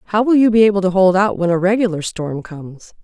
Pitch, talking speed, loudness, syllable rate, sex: 195 Hz, 255 wpm, -15 LUFS, 6.3 syllables/s, female